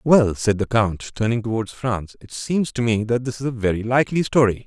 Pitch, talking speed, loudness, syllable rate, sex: 115 Hz, 230 wpm, -21 LUFS, 5.4 syllables/s, male